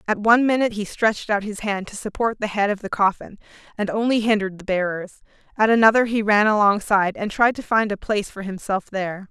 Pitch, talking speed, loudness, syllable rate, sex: 210 Hz, 220 wpm, -20 LUFS, 6.4 syllables/s, female